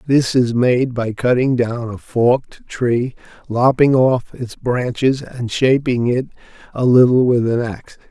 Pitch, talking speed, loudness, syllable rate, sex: 125 Hz, 155 wpm, -17 LUFS, 4.0 syllables/s, male